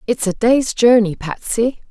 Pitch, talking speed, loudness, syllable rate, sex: 225 Hz, 155 wpm, -16 LUFS, 4.2 syllables/s, female